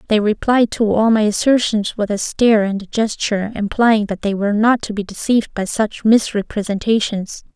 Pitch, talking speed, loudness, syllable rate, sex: 215 Hz, 185 wpm, -17 LUFS, 5.3 syllables/s, female